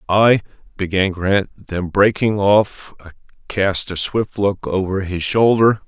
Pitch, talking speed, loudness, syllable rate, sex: 100 Hz, 135 wpm, -17 LUFS, 3.6 syllables/s, male